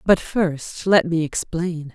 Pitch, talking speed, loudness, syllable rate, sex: 170 Hz, 155 wpm, -21 LUFS, 3.3 syllables/s, female